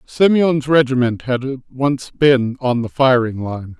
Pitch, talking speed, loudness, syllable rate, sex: 130 Hz, 140 wpm, -17 LUFS, 3.6 syllables/s, male